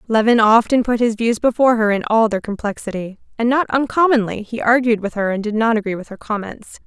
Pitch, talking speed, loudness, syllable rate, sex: 225 Hz, 220 wpm, -17 LUFS, 5.9 syllables/s, female